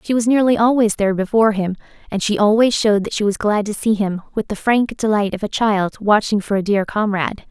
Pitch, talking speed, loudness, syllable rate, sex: 210 Hz, 240 wpm, -17 LUFS, 6.0 syllables/s, female